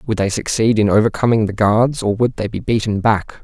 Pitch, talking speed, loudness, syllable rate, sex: 110 Hz, 225 wpm, -16 LUFS, 5.6 syllables/s, male